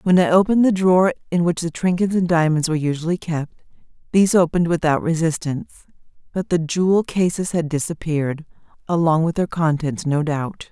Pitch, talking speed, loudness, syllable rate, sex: 170 Hz, 170 wpm, -19 LUFS, 5.9 syllables/s, female